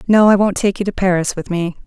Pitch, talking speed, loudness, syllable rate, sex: 190 Hz, 290 wpm, -16 LUFS, 6.1 syllables/s, female